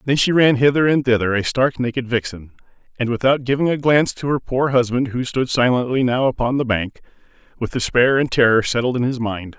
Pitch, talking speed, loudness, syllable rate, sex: 125 Hz, 215 wpm, -18 LUFS, 5.7 syllables/s, male